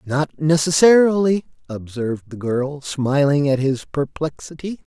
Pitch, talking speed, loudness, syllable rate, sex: 145 Hz, 110 wpm, -19 LUFS, 4.3 syllables/s, male